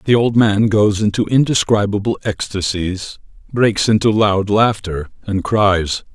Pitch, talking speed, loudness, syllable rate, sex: 105 Hz, 125 wpm, -16 LUFS, 3.9 syllables/s, male